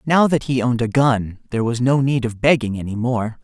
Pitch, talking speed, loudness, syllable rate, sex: 125 Hz, 245 wpm, -19 LUFS, 5.6 syllables/s, male